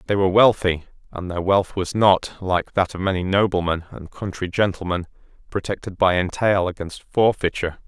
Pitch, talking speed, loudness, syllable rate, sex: 95 Hz, 160 wpm, -21 LUFS, 5.2 syllables/s, male